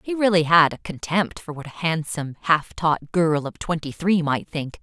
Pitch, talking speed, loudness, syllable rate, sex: 165 Hz, 210 wpm, -22 LUFS, 4.7 syllables/s, female